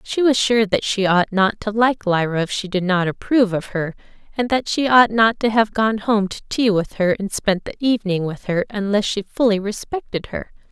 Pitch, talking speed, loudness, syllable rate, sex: 210 Hz, 230 wpm, -19 LUFS, 5.0 syllables/s, female